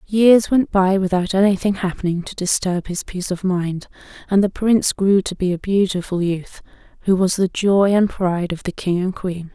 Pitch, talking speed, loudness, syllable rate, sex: 190 Hz, 200 wpm, -19 LUFS, 5.0 syllables/s, female